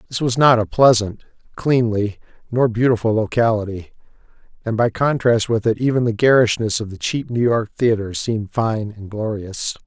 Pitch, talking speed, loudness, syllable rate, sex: 115 Hz, 165 wpm, -18 LUFS, 5.0 syllables/s, male